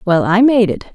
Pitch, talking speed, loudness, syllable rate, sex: 210 Hz, 255 wpm, -13 LUFS, 5.3 syllables/s, female